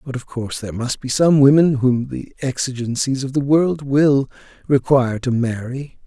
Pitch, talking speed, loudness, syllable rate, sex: 130 Hz, 180 wpm, -18 LUFS, 5.0 syllables/s, male